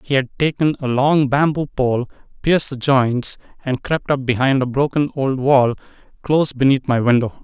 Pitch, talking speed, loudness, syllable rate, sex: 135 Hz, 175 wpm, -18 LUFS, 4.9 syllables/s, male